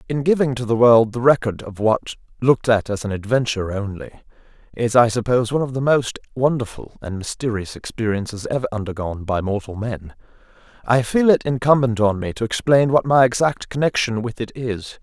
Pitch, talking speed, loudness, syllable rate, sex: 120 Hz, 185 wpm, -19 LUFS, 5.7 syllables/s, male